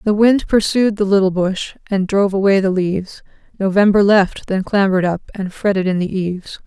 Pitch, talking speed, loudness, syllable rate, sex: 195 Hz, 190 wpm, -16 LUFS, 5.4 syllables/s, female